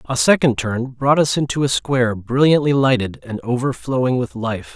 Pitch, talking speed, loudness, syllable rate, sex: 130 Hz, 175 wpm, -18 LUFS, 5.0 syllables/s, male